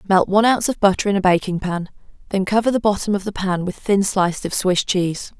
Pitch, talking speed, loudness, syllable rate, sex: 195 Hz, 245 wpm, -19 LUFS, 6.3 syllables/s, female